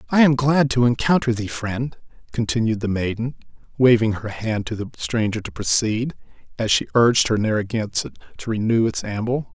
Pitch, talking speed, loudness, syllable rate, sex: 115 Hz, 170 wpm, -21 LUFS, 5.2 syllables/s, male